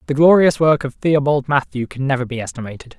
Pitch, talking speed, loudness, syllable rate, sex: 140 Hz, 200 wpm, -17 LUFS, 6.1 syllables/s, male